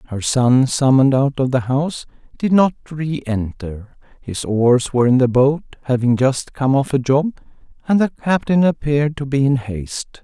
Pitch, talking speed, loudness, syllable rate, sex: 135 Hz, 175 wpm, -17 LUFS, 4.8 syllables/s, male